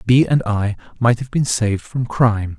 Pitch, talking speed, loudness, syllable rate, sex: 115 Hz, 210 wpm, -18 LUFS, 5.1 syllables/s, male